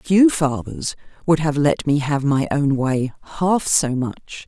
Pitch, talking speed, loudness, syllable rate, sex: 145 Hz, 175 wpm, -19 LUFS, 3.5 syllables/s, female